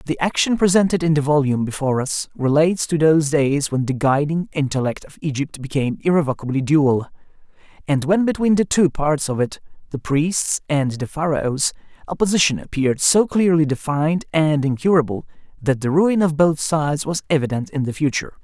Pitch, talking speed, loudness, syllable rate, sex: 150 Hz, 170 wpm, -19 LUFS, 5.7 syllables/s, male